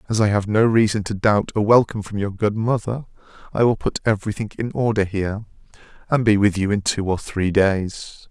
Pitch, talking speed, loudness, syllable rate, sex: 105 Hz, 215 wpm, -20 LUFS, 5.7 syllables/s, male